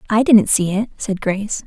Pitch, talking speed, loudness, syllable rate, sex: 205 Hz, 215 wpm, -17 LUFS, 5.1 syllables/s, female